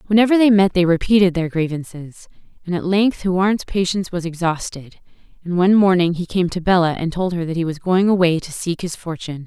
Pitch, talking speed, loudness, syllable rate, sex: 180 Hz, 210 wpm, -18 LUFS, 5.8 syllables/s, female